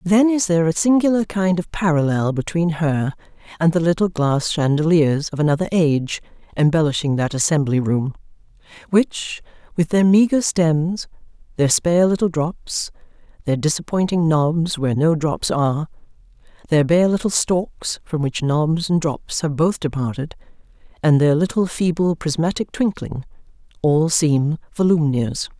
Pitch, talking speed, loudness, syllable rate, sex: 165 Hz, 140 wpm, -19 LUFS, 4.6 syllables/s, female